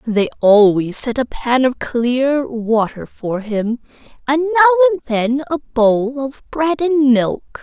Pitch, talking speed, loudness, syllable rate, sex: 265 Hz, 155 wpm, -16 LUFS, 3.5 syllables/s, female